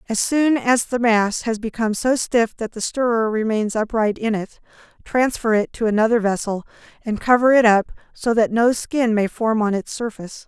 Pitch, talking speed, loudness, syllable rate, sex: 225 Hz, 195 wpm, -19 LUFS, 5.0 syllables/s, female